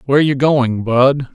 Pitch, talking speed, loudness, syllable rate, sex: 135 Hz, 180 wpm, -14 LUFS, 4.2 syllables/s, male